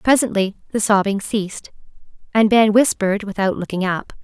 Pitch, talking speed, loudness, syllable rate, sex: 205 Hz, 140 wpm, -18 LUFS, 5.4 syllables/s, female